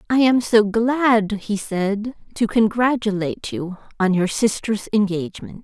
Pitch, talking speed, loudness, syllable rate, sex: 215 Hz, 140 wpm, -20 LUFS, 4.2 syllables/s, female